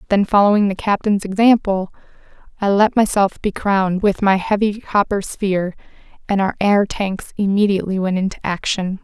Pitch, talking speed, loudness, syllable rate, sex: 200 Hz, 155 wpm, -17 LUFS, 5.2 syllables/s, female